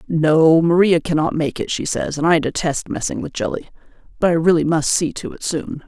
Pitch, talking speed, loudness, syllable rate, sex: 160 Hz, 215 wpm, -18 LUFS, 5.2 syllables/s, female